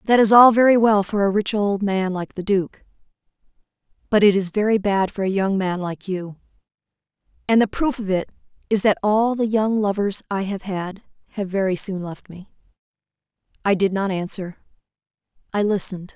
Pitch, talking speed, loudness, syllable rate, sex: 200 Hz, 180 wpm, -20 LUFS, 5.2 syllables/s, female